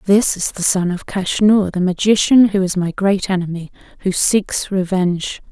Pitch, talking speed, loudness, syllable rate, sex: 190 Hz, 175 wpm, -16 LUFS, 4.7 syllables/s, female